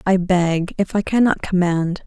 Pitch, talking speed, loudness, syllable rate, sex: 185 Hz, 145 wpm, -18 LUFS, 4.2 syllables/s, female